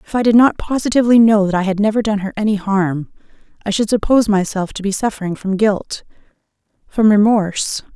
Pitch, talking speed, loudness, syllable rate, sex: 210 Hz, 190 wpm, -16 LUFS, 6.0 syllables/s, female